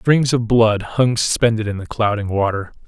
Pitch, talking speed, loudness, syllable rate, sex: 110 Hz, 190 wpm, -18 LUFS, 4.8 syllables/s, male